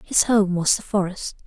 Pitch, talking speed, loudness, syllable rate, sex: 190 Hz, 205 wpm, -20 LUFS, 4.7 syllables/s, female